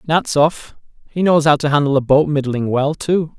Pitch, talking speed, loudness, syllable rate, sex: 150 Hz, 195 wpm, -16 LUFS, 4.9 syllables/s, male